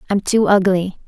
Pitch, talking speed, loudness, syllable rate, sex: 190 Hz, 225 wpm, -16 LUFS, 6.3 syllables/s, female